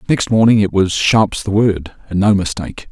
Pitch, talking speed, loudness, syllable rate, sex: 100 Hz, 205 wpm, -14 LUFS, 5.0 syllables/s, male